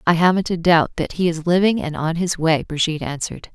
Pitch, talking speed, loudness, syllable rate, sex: 170 Hz, 235 wpm, -19 LUFS, 6.0 syllables/s, female